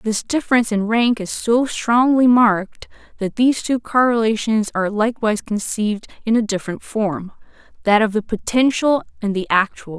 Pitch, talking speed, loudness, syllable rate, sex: 220 Hz, 150 wpm, -18 LUFS, 5.3 syllables/s, female